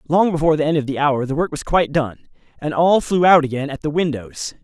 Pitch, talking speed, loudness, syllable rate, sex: 155 Hz, 260 wpm, -18 LUFS, 6.1 syllables/s, male